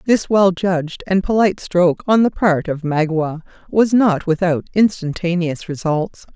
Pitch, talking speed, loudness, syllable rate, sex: 180 Hz, 150 wpm, -17 LUFS, 4.5 syllables/s, female